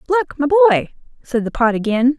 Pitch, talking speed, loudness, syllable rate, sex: 260 Hz, 190 wpm, -16 LUFS, 7.1 syllables/s, female